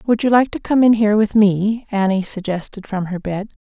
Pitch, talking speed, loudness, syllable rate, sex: 205 Hz, 230 wpm, -17 LUFS, 5.3 syllables/s, female